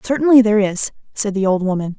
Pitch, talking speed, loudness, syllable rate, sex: 210 Hz, 210 wpm, -16 LUFS, 6.6 syllables/s, female